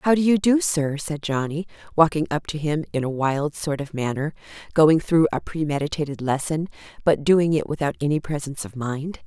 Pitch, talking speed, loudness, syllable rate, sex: 155 Hz, 190 wpm, -23 LUFS, 5.3 syllables/s, female